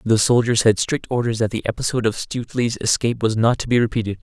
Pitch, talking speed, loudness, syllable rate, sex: 115 Hz, 225 wpm, -19 LUFS, 6.6 syllables/s, male